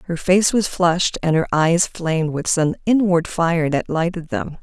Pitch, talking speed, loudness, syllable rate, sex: 170 Hz, 195 wpm, -19 LUFS, 4.5 syllables/s, female